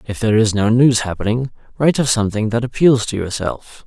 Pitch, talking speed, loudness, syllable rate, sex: 115 Hz, 200 wpm, -16 LUFS, 6.1 syllables/s, male